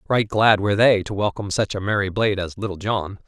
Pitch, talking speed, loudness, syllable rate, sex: 100 Hz, 240 wpm, -20 LUFS, 6.2 syllables/s, male